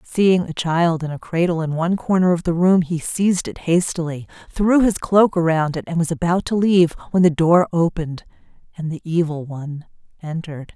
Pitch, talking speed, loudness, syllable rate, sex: 170 Hz, 195 wpm, -19 LUFS, 5.4 syllables/s, female